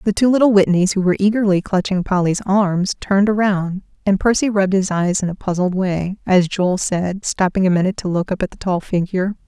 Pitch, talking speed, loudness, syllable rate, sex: 190 Hz, 215 wpm, -17 LUFS, 5.7 syllables/s, female